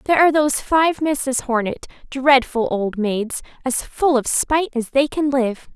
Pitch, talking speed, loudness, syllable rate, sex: 265 Hz, 155 wpm, -19 LUFS, 4.7 syllables/s, female